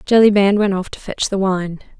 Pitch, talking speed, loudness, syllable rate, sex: 195 Hz, 210 wpm, -16 LUFS, 5.3 syllables/s, female